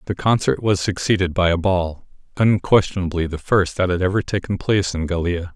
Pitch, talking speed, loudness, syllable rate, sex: 95 Hz, 185 wpm, -20 LUFS, 5.5 syllables/s, male